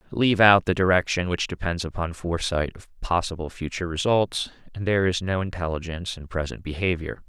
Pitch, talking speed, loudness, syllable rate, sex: 90 Hz, 165 wpm, -24 LUFS, 5.9 syllables/s, male